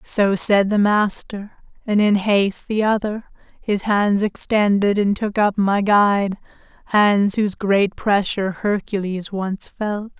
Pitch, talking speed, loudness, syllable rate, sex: 205 Hz, 140 wpm, -19 LUFS, 3.9 syllables/s, female